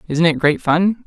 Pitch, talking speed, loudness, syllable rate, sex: 170 Hz, 225 wpm, -16 LUFS, 4.5 syllables/s, female